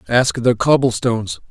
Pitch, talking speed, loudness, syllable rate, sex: 120 Hz, 160 wpm, -17 LUFS, 4.7 syllables/s, male